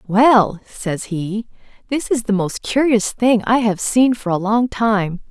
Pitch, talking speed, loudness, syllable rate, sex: 215 Hz, 180 wpm, -17 LUFS, 3.7 syllables/s, female